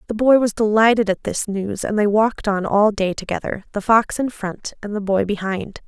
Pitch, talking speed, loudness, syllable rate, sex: 210 Hz, 225 wpm, -19 LUFS, 5.1 syllables/s, female